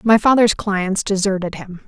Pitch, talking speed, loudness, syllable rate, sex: 200 Hz, 160 wpm, -17 LUFS, 5.1 syllables/s, female